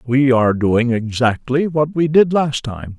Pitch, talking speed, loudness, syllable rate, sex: 130 Hz, 180 wpm, -16 LUFS, 4.3 syllables/s, male